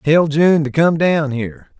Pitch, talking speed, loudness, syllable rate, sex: 150 Hz, 200 wpm, -15 LUFS, 4.3 syllables/s, male